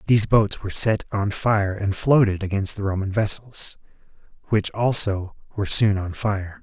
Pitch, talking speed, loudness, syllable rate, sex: 105 Hz, 165 wpm, -22 LUFS, 4.8 syllables/s, male